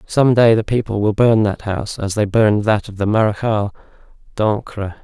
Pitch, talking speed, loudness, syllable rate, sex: 105 Hz, 190 wpm, -17 LUFS, 5.2 syllables/s, male